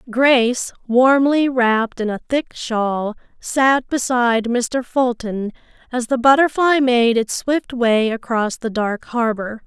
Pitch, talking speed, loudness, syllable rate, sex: 240 Hz, 135 wpm, -18 LUFS, 3.7 syllables/s, female